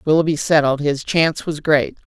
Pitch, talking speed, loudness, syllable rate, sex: 150 Hz, 165 wpm, -17 LUFS, 5.3 syllables/s, female